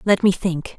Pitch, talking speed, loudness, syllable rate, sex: 190 Hz, 230 wpm, -20 LUFS, 4.5 syllables/s, female